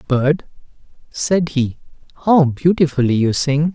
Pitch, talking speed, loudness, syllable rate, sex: 150 Hz, 110 wpm, -17 LUFS, 4.0 syllables/s, male